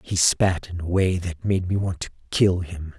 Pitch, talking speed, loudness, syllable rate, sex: 90 Hz, 220 wpm, -23 LUFS, 4.5 syllables/s, male